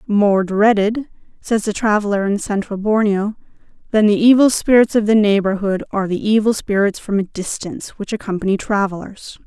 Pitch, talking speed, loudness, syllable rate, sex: 205 Hz, 160 wpm, -17 LUFS, 5.3 syllables/s, female